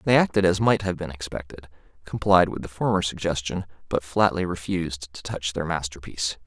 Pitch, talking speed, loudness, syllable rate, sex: 85 Hz, 175 wpm, -25 LUFS, 5.6 syllables/s, male